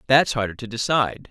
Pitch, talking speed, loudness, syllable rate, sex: 120 Hz, 185 wpm, -22 LUFS, 6.2 syllables/s, male